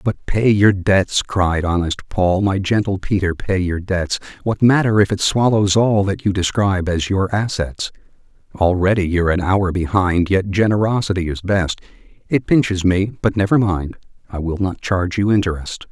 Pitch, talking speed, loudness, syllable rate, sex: 95 Hz, 170 wpm, -18 LUFS, 4.8 syllables/s, male